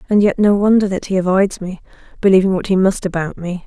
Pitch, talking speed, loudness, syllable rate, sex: 190 Hz, 230 wpm, -15 LUFS, 6.1 syllables/s, female